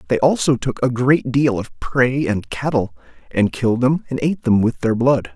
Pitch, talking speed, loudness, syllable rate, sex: 125 Hz, 215 wpm, -18 LUFS, 4.9 syllables/s, male